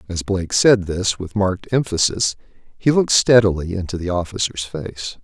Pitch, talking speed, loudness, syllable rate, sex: 95 Hz, 160 wpm, -19 LUFS, 5.2 syllables/s, male